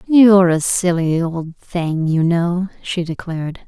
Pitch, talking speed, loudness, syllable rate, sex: 175 Hz, 145 wpm, -17 LUFS, 3.9 syllables/s, female